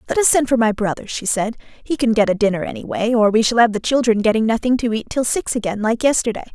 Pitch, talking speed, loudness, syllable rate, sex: 230 Hz, 265 wpm, -18 LUFS, 6.4 syllables/s, female